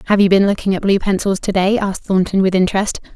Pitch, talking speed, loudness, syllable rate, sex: 195 Hz, 250 wpm, -16 LUFS, 6.8 syllables/s, female